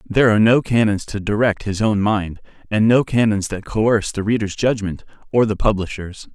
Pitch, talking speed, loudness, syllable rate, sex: 105 Hz, 190 wpm, -18 LUFS, 5.3 syllables/s, male